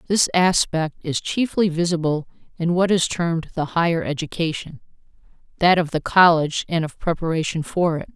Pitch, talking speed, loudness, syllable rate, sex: 165 Hz, 145 wpm, -20 LUFS, 5.2 syllables/s, female